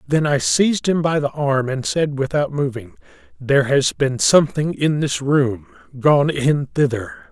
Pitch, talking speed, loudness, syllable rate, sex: 145 Hz, 165 wpm, -18 LUFS, 4.4 syllables/s, male